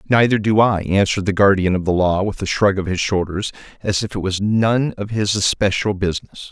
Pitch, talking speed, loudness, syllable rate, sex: 100 Hz, 220 wpm, -18 LUFS, 5.5 syllables/s, male